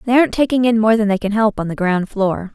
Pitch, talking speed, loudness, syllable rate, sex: 215 Hz, 305 wpm, -16 LUFS, 6.2 syllables/s, female